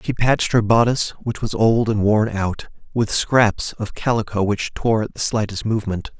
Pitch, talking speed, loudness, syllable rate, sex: 110 Hz, 195 wpm, -19 LUFS, 5.0 syllables/s, male